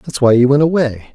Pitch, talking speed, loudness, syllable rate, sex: 135 Hz, 260 wpm, -13 LUFS, 6.6 syllables/s, male